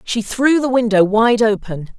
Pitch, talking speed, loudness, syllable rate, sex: 225 Hz, 180 wpm, -15 LUFS, 4.3 syllables/s, female